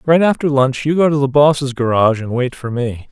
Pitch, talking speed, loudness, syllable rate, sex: 135 Hz, 250 wpm, -15 LUFS, 5.4 syllables/s, male